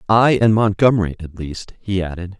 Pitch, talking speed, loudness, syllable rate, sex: 100 Hz, 175 wpm, -17 LUFS, 5.2 syllables/s, male